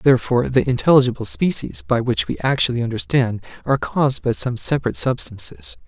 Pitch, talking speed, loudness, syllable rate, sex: 130 Hz, 155 wpm, -19 LUFS, 6.2 syllables/s, male